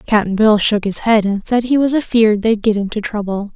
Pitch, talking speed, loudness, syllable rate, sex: 215 Hz, 235 wpm, -15 LUFS, 5.3 syllables/s, female